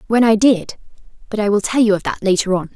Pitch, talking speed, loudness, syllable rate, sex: 210 Hz, 240 wpm, -16 LUFS, 6.5 syllables/s, female